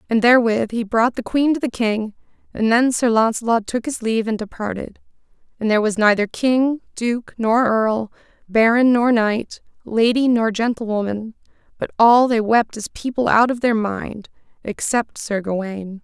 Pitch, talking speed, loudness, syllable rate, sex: 225 Hz, 170 wpm, -18 LUFS, 4.7 syllables/s, female